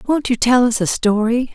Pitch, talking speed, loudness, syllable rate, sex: 240 Hz, 235 wpm, -16 LUFS, 5.0 syllables/s, female